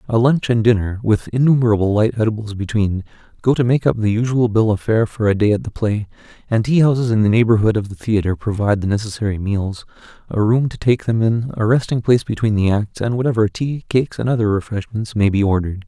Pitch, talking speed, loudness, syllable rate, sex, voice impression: 110 Hz, 225 wpm, -18 LUFS, 6.1 syllables/s, male, masculine, adult-like, slightly soft, slightly cool, slightly calm, reassuring, slightly sweet, slightly kind